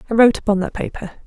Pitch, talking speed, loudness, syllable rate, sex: 215 Hz, 240 wpm, -18 LUFS, 8.4 syllables/s, female